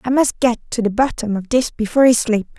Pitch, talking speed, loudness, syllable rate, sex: 235 Hz, 255 wpm, -17 LUFS, 5.8 syllables/s, female